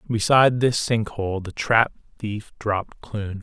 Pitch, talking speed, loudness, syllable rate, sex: 110 Hz, 155 wpm, -22 LUFS, 4.1 syllables/s, male